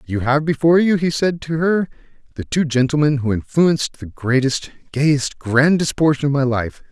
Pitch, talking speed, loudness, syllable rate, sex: 145 Hz, 180 wpm, -18 LUFS, 5.0 syllables/s, male